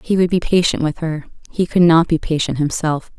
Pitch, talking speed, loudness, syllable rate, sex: 165 Hz, 225 wpm, -17 LUFS, 5.3 syllables/s, female